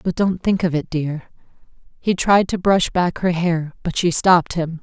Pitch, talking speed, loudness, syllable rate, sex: 175 Hz, 210 wpm, -19 LUFS, 4.5 syllables/s, female